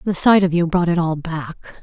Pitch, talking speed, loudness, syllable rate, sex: 170 Hz, 265 wpm, -17 LUFS, 5.4 syllables/s, female